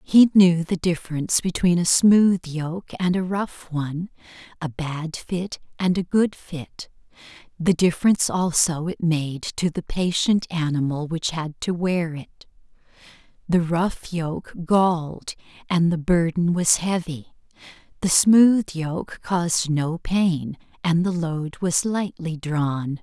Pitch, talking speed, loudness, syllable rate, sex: 170 Hz, 140 wpm, -22 LUFS, 3.8 syllables/s, female